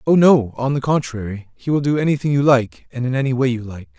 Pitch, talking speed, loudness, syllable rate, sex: 130 Hz, 255 wpm, -18 LUFS, 6.0 syllables/s, male